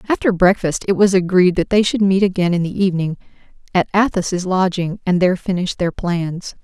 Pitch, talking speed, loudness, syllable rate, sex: 185 Hz, 190 wpm, -17 LUFS, 5.4 syllables/s, female